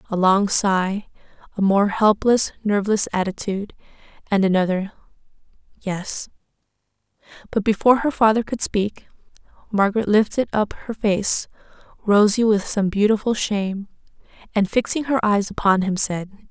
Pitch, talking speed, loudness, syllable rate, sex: 205 Hz, 125 wpm, -20 LUFS, 4.9 syllables/s, female